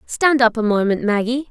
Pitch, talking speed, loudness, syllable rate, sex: 235 Hz, 200 wpm, -17 LUFS, 5.1 syllables/s, female